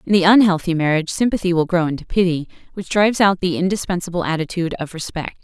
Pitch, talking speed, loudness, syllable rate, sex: 175 Hz, 190 wpm, -18 LUFS, 6.8 syllables/s, female